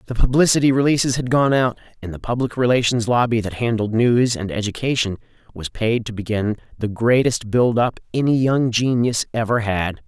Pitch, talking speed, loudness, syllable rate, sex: 115 Hz, 165 wpm, -19 LUFS, 5.3 syllables/s, male